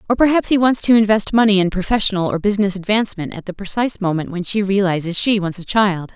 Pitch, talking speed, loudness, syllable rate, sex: 200 Hz, 225 wpm, -17 LUFS, 6.6 syllables/s, female